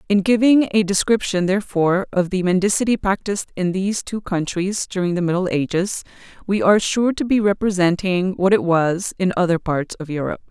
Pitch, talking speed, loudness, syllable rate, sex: 190 Hz, 175 wpm, -19 LUFS, 5.7 syllables/s, female